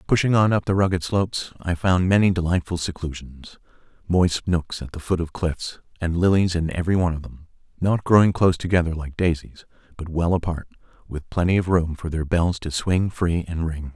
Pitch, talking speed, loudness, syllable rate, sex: 85 Hz, 195 wpm, -22 LUFS, 5.4 syllables/s, male